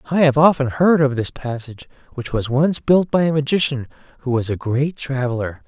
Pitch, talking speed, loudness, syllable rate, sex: 135 Hz, 200 wpm, -18 LUFS, 5.4 syllables/s, male